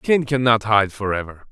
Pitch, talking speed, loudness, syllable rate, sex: 115 Hz, 200 wpm, -19 LUFS, 4.8 syllables/s, male